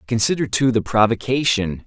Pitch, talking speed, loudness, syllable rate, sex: 120 Hz, 130 wpm, -18 LUFS, 5.2 syllables/s, male